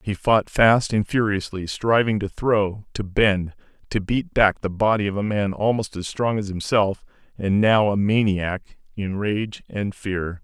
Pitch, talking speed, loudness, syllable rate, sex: 105 Hz, 180 wpm, -22 LUFS, 4.0 syllables/s, male